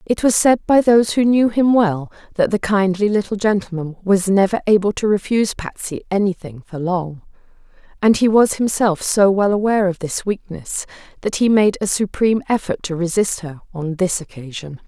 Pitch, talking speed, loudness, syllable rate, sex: 195 Hz, 180 wpm, -17 LUFS, 5.2 syllables/s, female